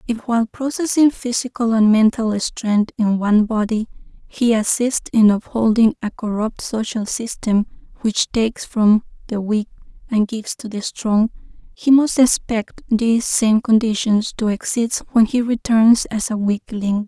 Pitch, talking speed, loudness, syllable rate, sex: 225 Hz, 150 wpm, -18 LUFS, 4.5 syllables/s, female